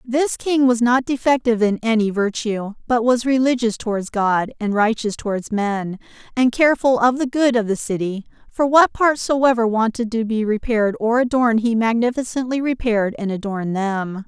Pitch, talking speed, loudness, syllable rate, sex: 230 Hz, 170 wpm, -19 LUFS, 3.1 syllables/s, female